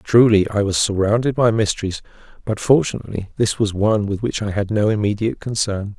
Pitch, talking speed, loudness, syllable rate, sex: 105 Hz, 180 wpm, -19 LUFS, 5.9 syllables/s, male